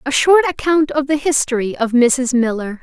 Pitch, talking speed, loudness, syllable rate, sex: 270 Hz, 190 wpm, -15 LUFS, 4.8 syllables/s, female